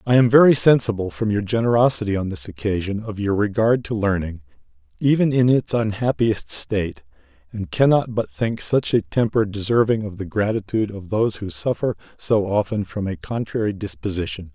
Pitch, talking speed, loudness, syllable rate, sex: 110 Hz, 170 wpm, -21 LUFS, 5.4 syllables/s, male